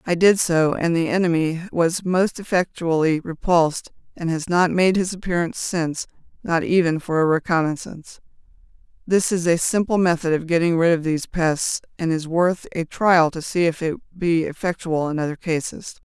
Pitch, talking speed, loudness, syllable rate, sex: 170 Hz, 170 wpm, -21 LUFS, 5.1 syllables/s, female